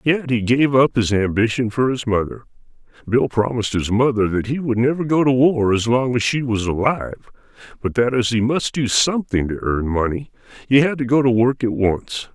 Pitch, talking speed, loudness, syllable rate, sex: 120 Hz, 215 wpm, -18 LUFS, 5.3 syllables/s, male